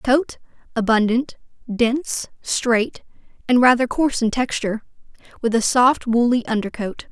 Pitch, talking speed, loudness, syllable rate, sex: 240 Hz, 110 wpm, -19 LUFS, 4.6 syllables/s, female